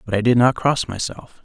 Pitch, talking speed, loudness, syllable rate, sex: 115 Hz, 250 wpm, -19 LUFS, 5.3 syllables/s, male